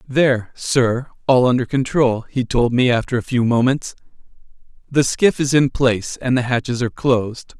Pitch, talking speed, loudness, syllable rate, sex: 125 Hz, 175 wpm, -18 LUFS, 5.0 syllables/s, male